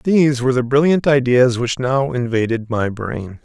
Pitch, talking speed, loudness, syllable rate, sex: 125 Hz, 175 wpm, -17 LUFS, 4.7 syllables/s, male